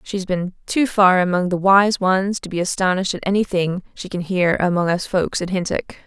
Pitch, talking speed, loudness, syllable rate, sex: 185 Hz, 210 wpm, -19 LUFS, 5.2 syllables/s, female